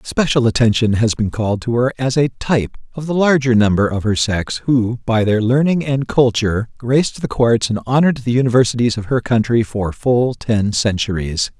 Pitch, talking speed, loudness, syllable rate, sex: 120 Hz, 190 wpm, -16 LUFS, 5.2 syllables/s, male